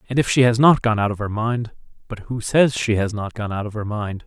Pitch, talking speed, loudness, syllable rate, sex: 110 Hz, 295 wpm, -20 LUFS, 5.7 syllables/s, male